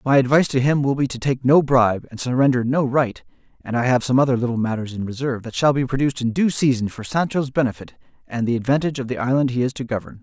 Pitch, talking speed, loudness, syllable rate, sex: 125 Hz, 250 wpm, -20 LUFS, 6.8 syllables/s, male